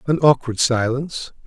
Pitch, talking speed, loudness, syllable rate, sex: 130 Hz, 125 wpm, -19 LUFS, 5.1 syllables/s, male